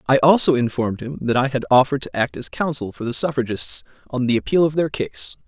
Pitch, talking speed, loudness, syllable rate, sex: 135 Hz, 230 wpm, -20 LUFS, 6.0 syllables/s, male